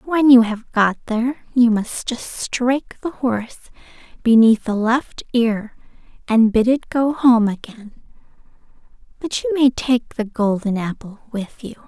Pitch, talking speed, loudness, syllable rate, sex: 235 Hz, 150 wpm, -18 LUFS, 4.2 syllables/s, female